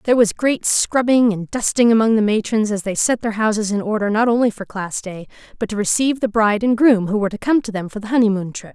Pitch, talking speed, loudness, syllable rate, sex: 215 Hz, 260 wpm, -18 LUFS, 6.3 syllables/s, female